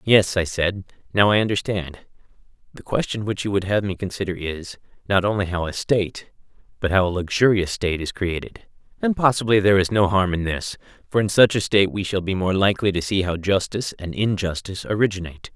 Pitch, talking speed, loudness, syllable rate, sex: 95 Hz, 200 wpm, -21 LUFS, 6.0 syllables/s, male